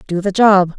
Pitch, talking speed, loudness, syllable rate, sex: 190 Hz, 230 wpm, -13 LUFS, 4.7 syllables/s, female